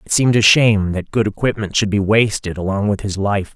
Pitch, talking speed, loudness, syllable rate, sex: 105 Hz, 235 wpm, -16 LUFS, 5.8 syllables/s, male